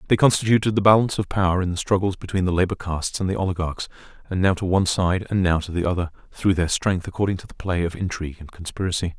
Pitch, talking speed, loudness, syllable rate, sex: 90 Hz, 240 wpm, -22 LUFS, 6.9 syllables/s, male